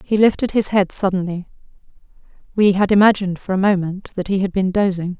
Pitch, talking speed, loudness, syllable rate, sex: 190 Hz, 185 wpm, -18 LUFS, 6.1 syllables/s, female